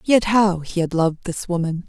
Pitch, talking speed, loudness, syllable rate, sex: 180 Hz, 225 wpm, -20 LUFS, 5.1 syllables/s, female